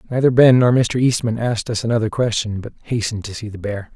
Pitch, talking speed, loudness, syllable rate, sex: 115 Hz, 230 wpm, -18 LUFS, 6.4 syllables/s, male